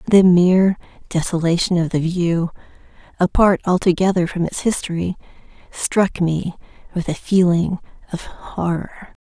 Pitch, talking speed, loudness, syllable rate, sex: 175 Hz, 115 wpm, -18 LUFS, 3.3 syllables/s, female